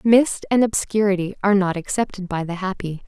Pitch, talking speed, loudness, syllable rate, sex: 195 Hz, 175 wpm, -21 LUFS, 5.6 syllables/s, female